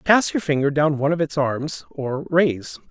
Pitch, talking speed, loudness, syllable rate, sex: 150 Hz, 205 wpm, -21 LUFS, 4.5 syllables/s, male